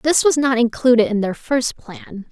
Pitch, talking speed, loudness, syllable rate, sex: 245 Hz, 205 wpm, -17 LUFS, 4.4 syllables/s, female